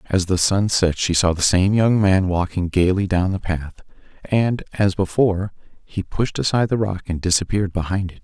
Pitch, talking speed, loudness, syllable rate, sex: 95 Hz, 195 wpm, -19 LUFS, 5.1 syllables/s, male